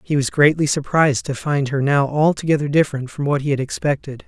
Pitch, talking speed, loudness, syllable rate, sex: 145 Hz, 210 wpm, -19 LUFS, 6.0 syllables/s, male